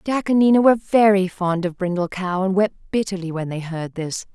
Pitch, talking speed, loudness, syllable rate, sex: 190 Hz, 220 wpm, -20 LUFS, 5.5 syllables/s, female